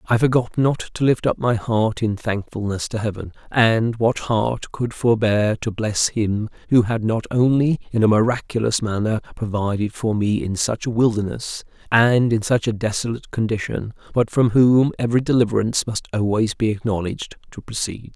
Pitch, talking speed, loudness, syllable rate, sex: 110 Hz, 170 wpm, -20 LUFS, 5.0 syllables/s, male